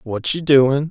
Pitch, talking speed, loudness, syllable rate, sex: 140 Hz, 200 wpm, -16 LUFS, 3.7 syllables/s, male